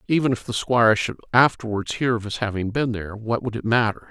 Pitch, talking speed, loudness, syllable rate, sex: 115 Hz, 235 wpm, -22 LUFS, 6.1 syllables/s, male